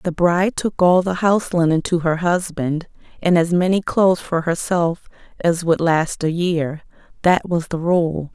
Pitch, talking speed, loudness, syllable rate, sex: 170 Hz, 180 wpm, -19 LUFS, 4.4 syllables/s, female